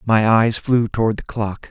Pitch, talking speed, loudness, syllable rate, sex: 110 Hz, 210 wpm, -18 LUFS, 4.4 syllables/s, male